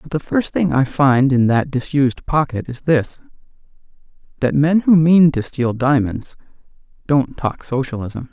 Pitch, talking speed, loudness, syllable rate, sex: 135 Hz, 160 wpm, -17 LUFS, 4.4 syllables/s, male